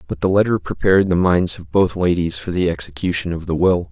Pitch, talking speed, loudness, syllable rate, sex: 90 Hz, 230 wpm, -18 LUFS, 5.9 syllables/s, male